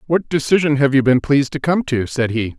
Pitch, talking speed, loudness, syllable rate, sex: 140 Hz, 255 wpm, -17 LUFS, 5.8 syllables/s, male